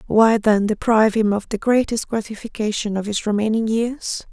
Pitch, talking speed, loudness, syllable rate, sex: 220 Hz, 165 wpm, -19 LUFS, 5.1 syllables/s, female